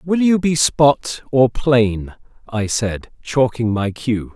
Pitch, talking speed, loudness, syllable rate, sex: 125 Hz, 150 wpm, -17 LUFS, 3.2 syllables/s, male